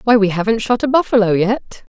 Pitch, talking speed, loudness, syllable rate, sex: 220 Hz, 210 wpm, -15 LUFS, 5.7 syllables/s, female